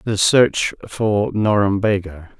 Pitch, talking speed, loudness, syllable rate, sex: 105 Hz, 100 wpm, -17 LUFS, 3.3 syllables/s, male